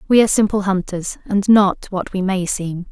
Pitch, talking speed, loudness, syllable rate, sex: 195 Hz, 205 wpm, -18 LUFS, 4.9 syllables/s, female